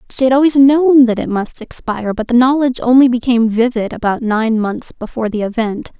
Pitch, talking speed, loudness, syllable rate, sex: 240 Hz, 200 wpm, -14 LUFS, 5.7 syllables/s, female